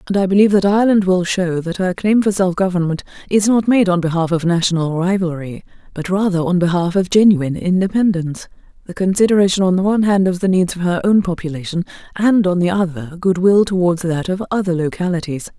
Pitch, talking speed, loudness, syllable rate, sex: 185 Hz, 195 wpm, -16 LUFS, 6.1 syllables/s, female